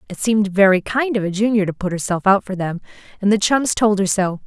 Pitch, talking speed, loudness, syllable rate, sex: 200 Hz, 255 wpm, -18 LUFS, 6.0 syllables/s, female